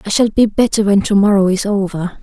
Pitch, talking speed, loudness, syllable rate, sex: 200 Hz, 240 wpm, -14 LUFS, 5.7 syllables/s, female